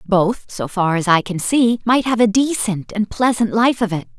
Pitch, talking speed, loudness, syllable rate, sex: 210 Hz, 230 wpm, -17 LUFS, 4.6 syllables/s, female